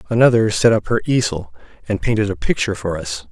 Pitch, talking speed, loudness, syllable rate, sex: 105 Hz, 200 wpm, -18 LUFS, 6.3 syllables/s, male